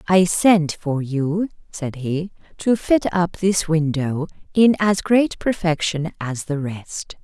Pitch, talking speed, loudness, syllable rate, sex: 170 Hz, 150 wpm, -20 LUFS, 3.4 syllables/s, female